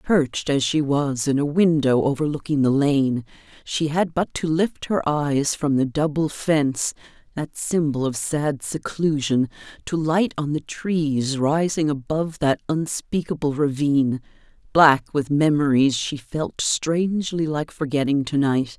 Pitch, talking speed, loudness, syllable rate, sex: 145 Hz, 145 wpm, -22 LUFS, 3.9 syllables/s, female